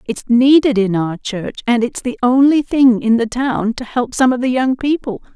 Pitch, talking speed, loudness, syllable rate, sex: 245 Hz, 225 wpm, -15 LUFS, 4.7 syllables/s, female